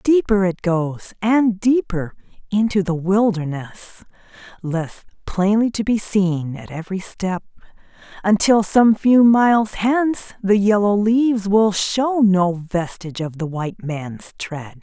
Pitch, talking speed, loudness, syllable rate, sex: 200 Hz, 135 wpm, -18 LUFS, 4.1 syllables/s, female